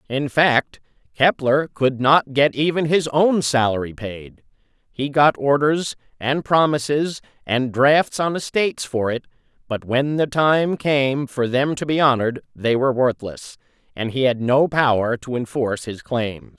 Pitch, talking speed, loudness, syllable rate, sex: 135 Hz, 160 wpm, -19 LUFS, 4.2 syllables/s, male